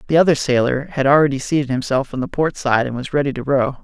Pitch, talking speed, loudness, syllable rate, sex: 135 Hz, 250 wpm, -18 LUFS, 6.4 syllables/s, male